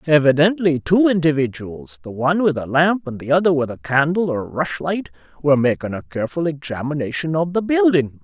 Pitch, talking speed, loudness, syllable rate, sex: 150 Hz, 175 wpm, -19 LUFS, 5.6 syllables/s, male